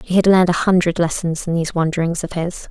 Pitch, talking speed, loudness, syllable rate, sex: 175 Hz, 245 wpm, -18 LUFS, 6.5 syllables/s, female